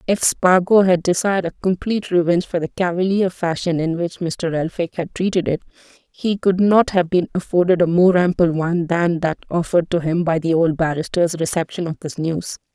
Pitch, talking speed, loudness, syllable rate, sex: 175 Hz, 195 wpm, -19 LUFS, 5.4 syllables/s, female